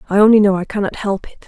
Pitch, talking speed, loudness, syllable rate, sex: 200 Hz, 285 wpm, -15 LUFS, 7.1 syllables/s, female